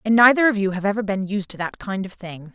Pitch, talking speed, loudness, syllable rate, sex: 200 Hz, 305 wpm, -20 LUFS, 6.1 syllables/s, female